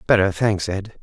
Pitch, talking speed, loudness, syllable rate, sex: 100 Hz, 175 wpm, -20 LUFS, 4.6 syllables/s, male